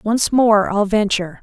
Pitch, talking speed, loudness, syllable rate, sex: 210 Hz, 170 wpm, -16 LUFS, 4.3 syllables/s, female